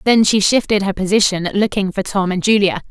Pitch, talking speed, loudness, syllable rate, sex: 200 Hz, 205 wpm, -16 LUFS, 5.6 syllables/s, female